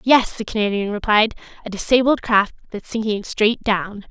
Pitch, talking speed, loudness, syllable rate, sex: 215 Hz, 160 wpm, -19 LUFS, 4.9 syllables/s, female